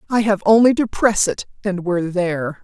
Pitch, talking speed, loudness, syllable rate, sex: 195 Hz, 205 wpm, -17 LUFS, 5.4 syllables/s, female